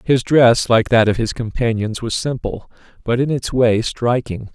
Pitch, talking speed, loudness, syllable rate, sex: 120 Hz, 185 wpm, -17 LUFS, 4.4 syllables/s, male